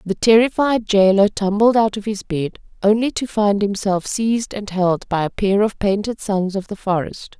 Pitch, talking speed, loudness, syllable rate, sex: 205 Hz, 195 wpm, -18 LUFS, 4.7 syllables/s, female